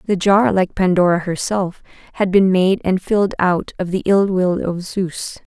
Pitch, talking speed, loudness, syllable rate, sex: 185 Hz, 185 wpm, -17 LUFS, 4.4 syllables/s, female